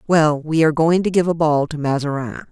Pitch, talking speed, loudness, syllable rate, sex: 155 Hz, 240 wpm, -18 LUFS, 5.7 syllables/s, female